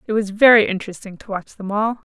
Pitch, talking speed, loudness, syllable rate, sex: 205 Hz, 230 wpm, -17 LUFS, 6.2 syllables/s, female